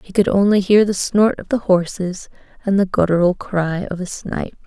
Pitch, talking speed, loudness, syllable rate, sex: 190 Hz, 205 wpm, -18 LUFS, 5.1 syllables/s, female